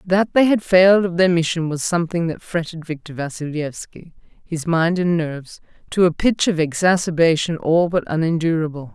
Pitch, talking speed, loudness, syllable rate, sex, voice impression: 170 Hz, 170 wpm, -19 LUFS, 5.2 syllables/s, female, very feminine, adult-like, intellectual